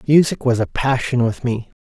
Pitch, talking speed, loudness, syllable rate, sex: 125 Hz, 195 wpm, -18 LUFS, 5.0 syllables/s, male